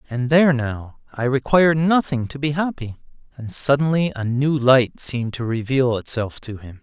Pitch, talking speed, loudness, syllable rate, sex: 130 Hz, 175 wpm, -20 LUFS, 4.9 syllables/s, male